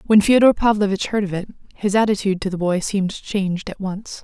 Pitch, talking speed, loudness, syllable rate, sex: 200 Hz, 215 wpm, -19 LUFS, 6.0 syllables/s, female